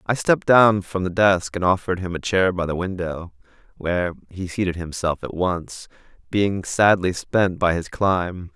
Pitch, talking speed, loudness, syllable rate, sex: 90 Hz, 180 wpm, -21 LUFS, 4.6 syllables/s, male